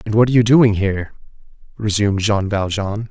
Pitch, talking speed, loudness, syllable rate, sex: 105 Hz, 175 wpm, -17 LUFS, 5.9 syllables/s, male